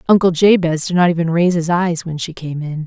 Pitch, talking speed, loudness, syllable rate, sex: 170 Hz, 250 wpm, -16 LUFS, 5.9 syllables/s, female